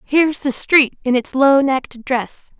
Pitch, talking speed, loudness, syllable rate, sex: 270 Hz, 185 wpm, -16 LUFS, 4.2 syllables/s, female